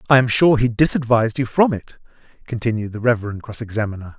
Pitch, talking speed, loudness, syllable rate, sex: 120 Hz, 185 wpm, -19 LUFS, 6.6 syllables/s, male